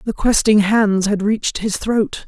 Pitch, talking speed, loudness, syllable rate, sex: 210 Hz, 185 wpm, -17 LUFS, 4.2 syllables/s, female